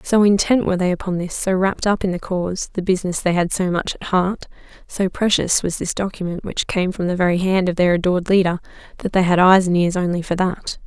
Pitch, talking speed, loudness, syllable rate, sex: 185 Hz, 245 wpm, -19 LUFS, 5.9 syllables/s, female